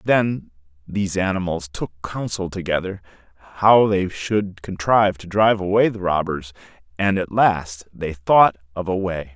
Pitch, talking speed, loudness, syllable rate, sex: 95 Hz, 145 wpm, -20 LUFS, 4.5 syllables/s, male